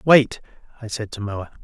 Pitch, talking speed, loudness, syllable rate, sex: 115 Hz, 185 wpm, -22 LUFS, 4.8 syllables/s, male